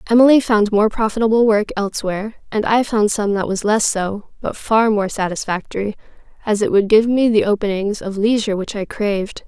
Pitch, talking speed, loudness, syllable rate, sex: 210 Hz, 190 wpm, -17 LUFS, 5.6 syllables/s, female